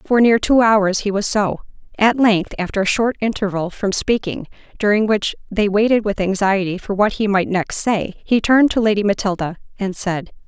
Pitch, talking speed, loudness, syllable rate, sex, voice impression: 205 Hz, 190 wpm, -18 LUFS, 3.7 syllables/s, female, feminine, adult-like, tensed, powerful, clear, fluent, intellectual, calm, elegant, lively, strict